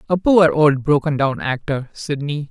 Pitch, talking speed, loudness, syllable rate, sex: 145 Hz, 170 wpm, -17 LUFS, 4.4 syllables/s, male